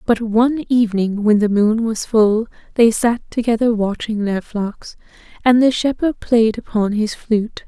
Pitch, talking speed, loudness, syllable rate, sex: 225 Hz, 165 wpm, -17 LUFS, 4.4 syllables/s, female